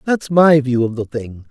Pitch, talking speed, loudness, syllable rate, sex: 140 Hz, 240 wpm, -15 LUFS, 4.4 syllables/s, male